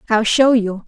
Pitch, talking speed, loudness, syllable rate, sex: 225 Hz, 205 wpm, -15 LUFS, 4.5 syllables/s, female